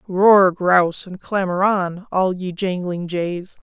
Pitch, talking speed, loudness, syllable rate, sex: 185 Hz, 145 wpm, -18 LUFS, 3.5 syllables/s, female